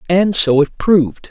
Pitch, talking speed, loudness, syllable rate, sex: 165 Hz, 185 wpm, -14 LUFS, 4.4 syllables/s, male